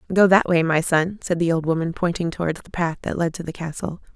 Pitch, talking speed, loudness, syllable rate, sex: 170 Hz, 260 wpm, -22 LUFS, 6.0 syllables/s, female